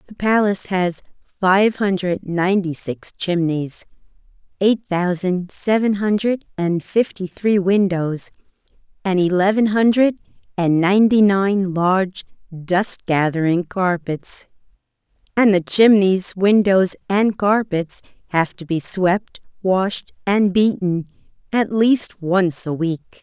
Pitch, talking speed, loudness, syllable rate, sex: 190 Hz, 115 wpm, -18 LUFS, 3.8 syllables/s, female